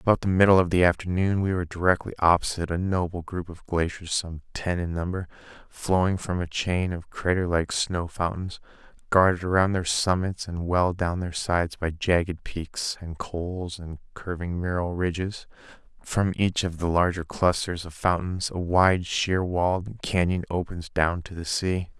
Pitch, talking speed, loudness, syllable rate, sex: 90 Hz, 175 wpm, -25 LUFS, 4.7 syllables/s, male